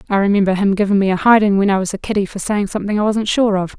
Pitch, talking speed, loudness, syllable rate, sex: 200 Hz, 300 wpm, -16 LUFS, 7.2 syllables/s, female